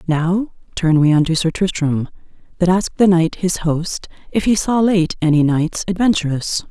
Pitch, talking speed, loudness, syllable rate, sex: 175 Hz, 170 wpm, -17 LUFS, 4.7 syllables/s, female